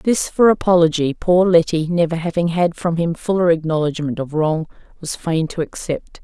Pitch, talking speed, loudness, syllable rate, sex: 165 Hz, 175 wpm, -18 LUFS, 5.0 syllables/s, female